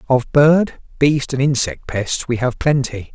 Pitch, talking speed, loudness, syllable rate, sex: 130 Hz, 170 wpm, -17 LUFS, 3.9 syllables/s, male